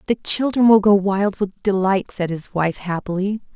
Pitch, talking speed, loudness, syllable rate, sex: 195 Hz, 185 wpm, -19 LUFS, 4.6 syllables/s, female